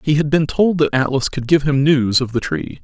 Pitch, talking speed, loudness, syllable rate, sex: 145 Hz, 275 wpm, -17 LUFS, 5.2 syllables/s, male